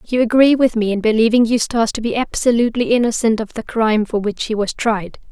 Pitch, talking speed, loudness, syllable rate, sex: 225 Hz, 215 wpm, -16 LUFS, 6.1 syllables/s, female